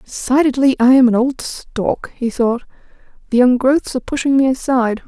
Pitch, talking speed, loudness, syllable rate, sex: 255 Hz, 180 wpm, -15 LUFS, 5.2 syllables/s, female